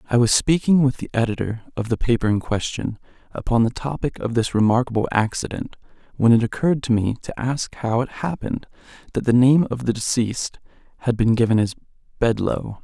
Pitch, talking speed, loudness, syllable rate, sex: 120 Hz, 180 wpm, -21 LUFS, 5.8 syllables/s, male